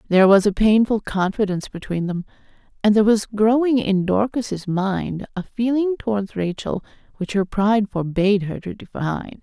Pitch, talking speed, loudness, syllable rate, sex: 205 Hz, 160 wpm, -20 LUFS, 5.3 syllables/s, female